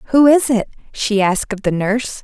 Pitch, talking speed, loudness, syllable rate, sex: 225 Hz, 215 wpm, -16 LUFS, 5.2 syllables/s, female